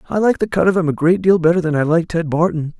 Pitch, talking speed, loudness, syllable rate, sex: 165 Hz, 320 wpm, -16 LUFS, 7.0 syllables/s, male